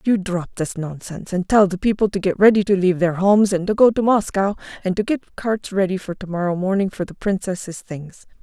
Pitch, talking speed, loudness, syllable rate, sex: 190 Hz, 220 wpm, -19 LUFS, 5.5 syllables/s, female